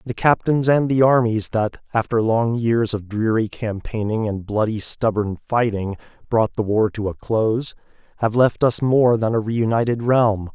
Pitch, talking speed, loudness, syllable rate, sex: 110 Hz, 170 wpm, -20 LUFS, 4.5 syllables/s, male